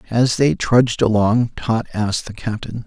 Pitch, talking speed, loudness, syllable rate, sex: 115 Hz, 170 wpm, -18 LUFS, 4.7 syllables/s, male